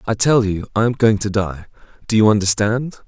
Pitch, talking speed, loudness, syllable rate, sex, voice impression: 110 Hz, 195 wpm, -17 LUFS, 5.3 syllables/s, male, masculine, adult-like, thick, slightly powerful, slightly halting, slightly raspy, cool, sincere, slightly mature, reassuring, wild, lively, kind